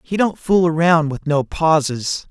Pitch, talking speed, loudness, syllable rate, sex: 160 Hz, 180 wpm, -17 LUFS, 4.1 syllables/s, male